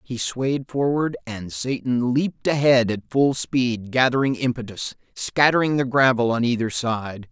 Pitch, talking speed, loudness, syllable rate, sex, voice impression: 125 Hz, 150 wpm, -21 LUFS, 4.4 syllables/s, male, masculine, middle-aged, tensed, powerful, clear, slightly nasal, mature, wild, lively, slightly strict, slightly intense